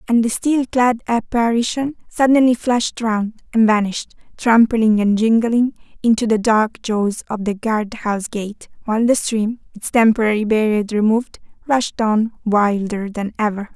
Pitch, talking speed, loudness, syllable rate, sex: 225 Hz, 145 wpm, -18 LUFS, 4.6 syllables/s, female